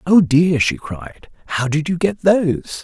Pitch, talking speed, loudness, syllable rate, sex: 160 Hz, 190 wpm, -17 LUFS, 4.2 syllables/s, male